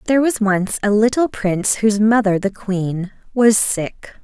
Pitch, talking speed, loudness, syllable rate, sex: 210 Hz, 170 wpm, -17 LUFS, 4.5 syllables/s, female